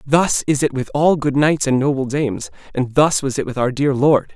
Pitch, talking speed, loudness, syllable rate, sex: 140 Hz, 250 wpm, -17 LUFS, 5.1 syllables/s, male